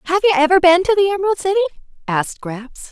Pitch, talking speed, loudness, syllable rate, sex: 345 Hz, 205 wpm, -16 LUFS, 8.1 syllables/s, female